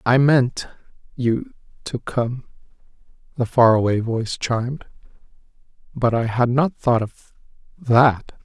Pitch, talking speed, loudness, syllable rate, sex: 120 Hz, 90 wpm, -20 LUFS, 3.9 syllables/s, male